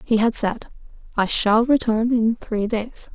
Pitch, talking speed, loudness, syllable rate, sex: 225 Hz, 170 wpm, -20 LUFS, 3.9 syllables/s, female